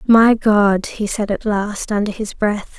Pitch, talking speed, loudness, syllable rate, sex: 210 Hz, 195 wpm, -17 LUFS, 3.8 syllables/s, female